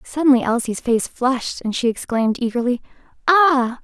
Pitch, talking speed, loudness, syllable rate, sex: 255 Hz, 140 wpm, -19 LUFS, 5.3 syllables/s, female